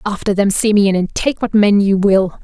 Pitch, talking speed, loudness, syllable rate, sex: 200 Hz, 220 wpm, -14 LUFS, 4.8 syllables/s, female